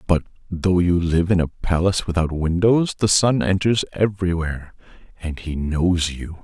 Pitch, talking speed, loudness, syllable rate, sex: 90 Hz, 160 wpm, -20 LUFS, 4.8 syllables/s, male